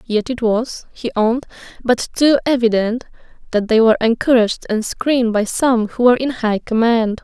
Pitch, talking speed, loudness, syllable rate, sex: 230 Hz, 175 wpm, -16 LUFS, 5.2 syllables/s, female